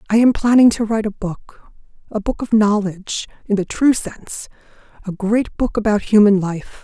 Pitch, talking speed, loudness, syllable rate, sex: 210 Hz, 165 wpm, -17 LUFS, 5.4 syllables/s, female